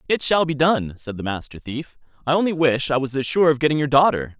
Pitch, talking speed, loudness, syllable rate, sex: 145 Hz, 260 wpm, -20 LUFS, 5.9 syllables/s, male